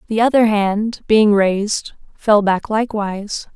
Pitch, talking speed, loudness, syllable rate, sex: 210 Hz, 135 wpm, -16 LUFS, 4.2 syllables/s, female